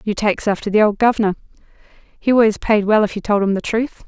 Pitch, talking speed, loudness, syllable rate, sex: 210 Hz, 235 wpm, -17 LUFS, 6.3 syllables/s, female